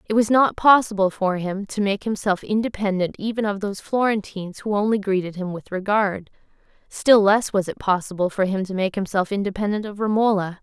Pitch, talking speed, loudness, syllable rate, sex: 200 Hz, 185 wpm, -21 LUFS, 5.6 syllables/s, female